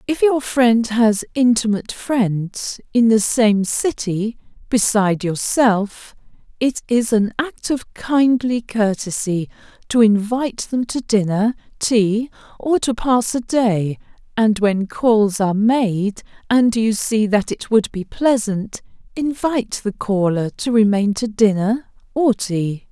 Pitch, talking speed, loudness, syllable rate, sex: 225 Hz, 135 wpm, -18 LUFS, 3.7 syllables/s, female